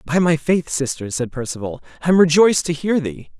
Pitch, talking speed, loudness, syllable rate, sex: 155 Hz, 210 wpm, -18 LUFS, 5.7 syllables/s, male